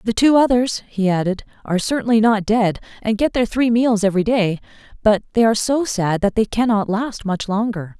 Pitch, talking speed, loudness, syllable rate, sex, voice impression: 215 Hz, 205 wpm, -18 LUFS, 5.4 syllables/s, female, feminine, adult-like, slightly muffled, slightly calm, friendly, slightly kind